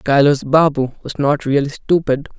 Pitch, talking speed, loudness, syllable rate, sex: 145 Hz, 150 wpm, -16 LUFS, 4.6 syllables/s, male